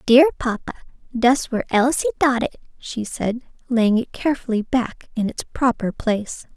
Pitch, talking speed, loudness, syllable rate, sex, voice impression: 240 Hz, 155 wpm, -21 LUFS, 4.9 syllables/s, female, feminine, adult-like, tensed, powerful, clear, fluent, intellectual, calm, friendly, reassuring, elegant, kind, modest